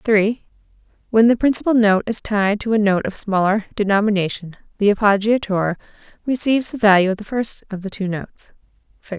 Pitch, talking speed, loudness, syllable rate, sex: 210 Hz, 170 wpm, -18 LUFS, 6.1 syllables/s, female